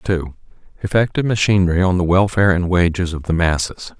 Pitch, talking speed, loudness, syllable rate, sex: 90 Hz, 180 wpm, -17 LUFS, 5.8 syllables/s, male